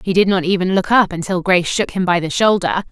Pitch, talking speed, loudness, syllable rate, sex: 185 Hz, 270 wpm, -16 LUFS, 6.2 syllables/s, female